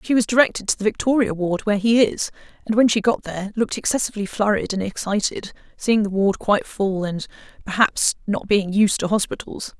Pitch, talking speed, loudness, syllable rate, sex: 205 Hz, 190 wpm, -20 LUFS, 5.9 syllables/s, female